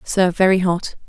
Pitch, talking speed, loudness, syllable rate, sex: 185 Hz, 165 wpm, -17 LUFS, 5.6 syllables/s, female